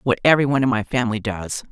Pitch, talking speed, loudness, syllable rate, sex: 120 Hz, 245 wpm, -19 LUFS, 7.9 syllables/s, female